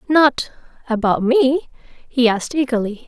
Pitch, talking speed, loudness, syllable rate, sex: 255 Hz, 100 wpm, -18 LUFS, 4.2 syllables/s, female